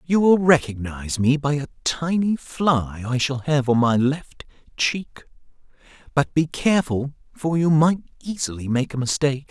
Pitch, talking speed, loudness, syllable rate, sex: 145 Hz, 160 wpm, -21 LUFS, 4.6 syllables/s, male